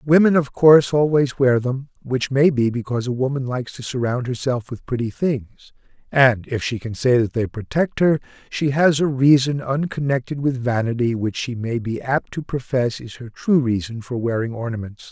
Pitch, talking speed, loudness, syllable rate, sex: 130 Hz, 195 wpm, -20 LUFS, 5.1 syllables/s, male